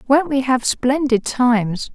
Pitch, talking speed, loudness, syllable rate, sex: 255 Hz, 155 wpm, -18 LUFS, 4.0 syllables/s, female